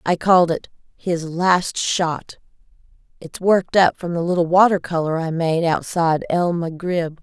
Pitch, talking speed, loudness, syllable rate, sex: 170 Hz, 160 wpm, -19 LUFS, 4.5 syllables/s, female